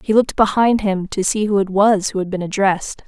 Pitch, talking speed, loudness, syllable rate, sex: 200 Hz, 255 wpm, -17 LUFS, 5.7 syllables/s, female